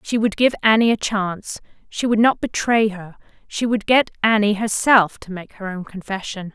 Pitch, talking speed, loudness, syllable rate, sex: 210 Hz, 190 wpm, -19 LUFS, 5.0 syllables/s, female